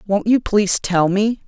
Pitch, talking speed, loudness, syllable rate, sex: 205 Hz, 205 wpm, -17 LUFS, 4.6 syllables/s, female